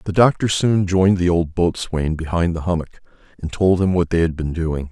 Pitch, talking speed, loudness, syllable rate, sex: 85 Hz, 220 wpm, -19 LUFS, 5.5 syllables/s, male